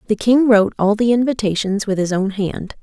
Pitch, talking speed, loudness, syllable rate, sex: 210 Hz, 210 wpm, -17 LUFS, 5.5 syllables/s, female